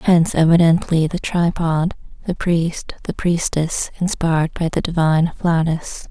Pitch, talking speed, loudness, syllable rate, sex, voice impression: 165 Hz, 130 wpm, -18 LUFS, 4.4 syllables/s, female, feminine, adult-like, relaxed, slightly weak, soft, fluent, raspy, intellectual, calm, slightly reassuring, elegant, kind, modest